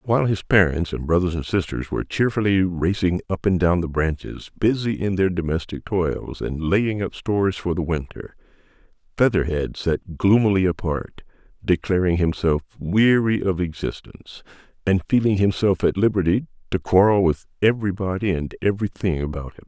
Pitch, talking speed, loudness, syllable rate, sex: 90 Hz, 150 wpm, -21 LUFS, 5.2 syllables/s, male